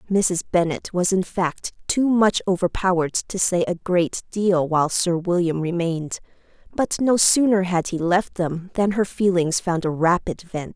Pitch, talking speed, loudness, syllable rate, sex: 180 Hz, 175 wpm, -21 LUFS, 4.5 syllables/s, female